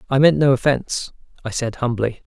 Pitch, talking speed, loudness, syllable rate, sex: 130 Hz, 180 wpm, -19 LUFS, 5.8 syllables/s, male